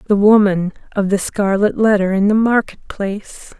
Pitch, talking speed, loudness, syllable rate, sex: 200 Hz, 150 wpm, -15 LUFS, 4.7 syllables/s, female